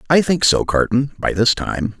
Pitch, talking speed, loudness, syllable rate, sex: 120 Hz, 210 wpm, -17 LUFS, 4.7 syllables/s, male